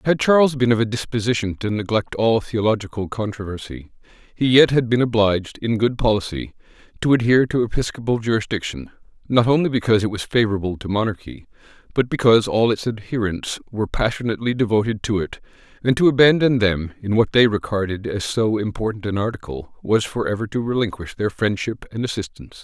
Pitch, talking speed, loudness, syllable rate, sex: 110 Hz, 165 wpm, -20 LUFS, 6.0 syllables/s, male